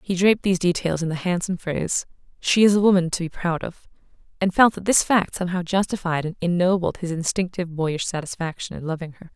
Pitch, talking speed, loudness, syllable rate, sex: 175 Hz, 200 wpm, -22 LUFS, 6.1 syllables/s, female